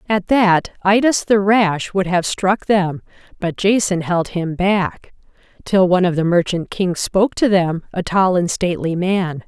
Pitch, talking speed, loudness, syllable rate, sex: 185 Hz, 175 wpm, -17 LUFS, 4.3 syllables/s, female